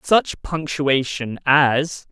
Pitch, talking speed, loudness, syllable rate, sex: 145 Hz, 85 wpm, -19 LUFS, 2.6 syllables/s, male